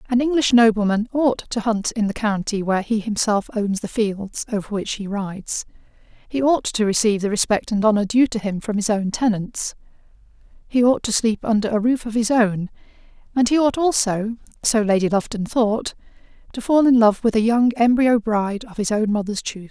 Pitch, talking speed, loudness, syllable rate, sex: 220 Hz, 195 wpm, -20 LUFS, 5.3 syllables/s, female